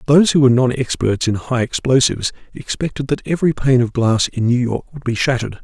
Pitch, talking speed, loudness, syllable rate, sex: 125 Hz, 215 wpm, -17 LUFS, 6.1 syllables/s, male